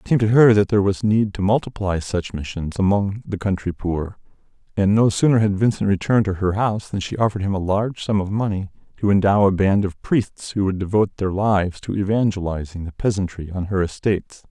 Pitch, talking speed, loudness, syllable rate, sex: 100 Hz, 215 wpm, -20 LUFS, 5.9 syllables/s, male